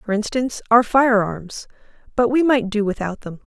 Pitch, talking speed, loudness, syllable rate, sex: 225 Hz, 170 wpm, -19 LUFS, 5.1 syllables/s, female